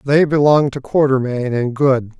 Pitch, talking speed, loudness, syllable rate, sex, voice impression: 135 Hz, 165 wpm, -15 LUFS, 4.4 syllables/s, male, very masculine, very middle-aged, slightly thick, slightly muffled, sincere, slightly calm, slightly mature